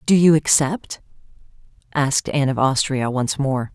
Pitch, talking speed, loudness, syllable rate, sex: 140 Hz, 145 wpm, -19 LUFS, 4.8 syllables/s, female